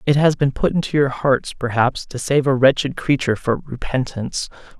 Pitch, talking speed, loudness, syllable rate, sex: 135 Hz, 190 wpm, -19 LUFS, 5.2 syllables/s, male